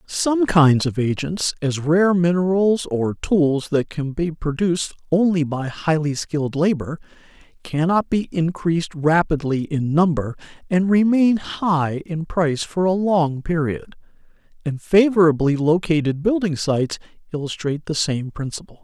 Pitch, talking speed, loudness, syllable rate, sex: 165 Hz, 135 wpm, -20 LUFS, 4.4 syllables/s, male